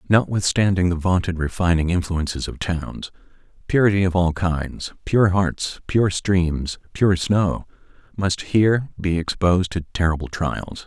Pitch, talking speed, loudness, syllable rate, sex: 90 Hz, 120 wpm, -21 LUFS, 4.2 syllables/s, male